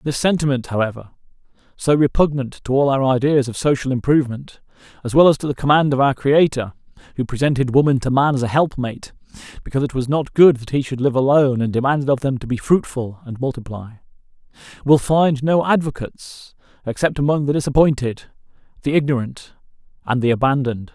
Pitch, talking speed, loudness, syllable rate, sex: 135 Hz, 175 wpm, -18 LUFS, 6.1 syllables/s, male